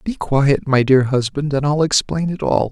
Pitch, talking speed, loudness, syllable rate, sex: 145 Hz, 220 wpm, -17 LUFS, 4.6 syllables/s, male